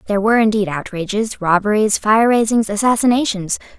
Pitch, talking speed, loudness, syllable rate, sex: 210 Hz, 110 wpm, -16 LUFS, 6.1 syllables/s, female